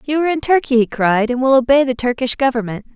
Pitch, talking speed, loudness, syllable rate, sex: 255 Hz, 245 wpm, -16 LUFS, 6.5 syllables/s, female